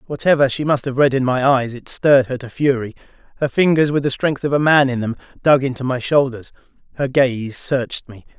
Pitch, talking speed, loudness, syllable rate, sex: 135 Hz, 220 wpm, -17 LUFS, 5.6 syllables/s, male